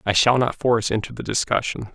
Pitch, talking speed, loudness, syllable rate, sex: 115 Hz, 215 wpm, -21 LUFS, 6.4 syllables/s, male